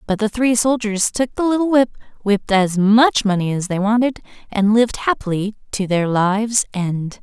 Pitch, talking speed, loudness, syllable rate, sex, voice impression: 215 Hz, 185 wpm, -18 LUFS, 4.9 syllables/s, female, feminine, slightly adult-like, slightly powerful, unique, slightly intense